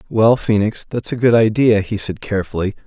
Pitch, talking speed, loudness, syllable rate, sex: 105 Hz, 190 wpm, -17 LUFS, 5.6 syllables/s, male